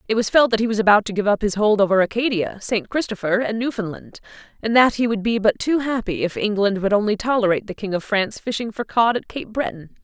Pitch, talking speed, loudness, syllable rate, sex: 215 Hz, 245 wpm, -20 LUFS, 6.2 syllables/s, female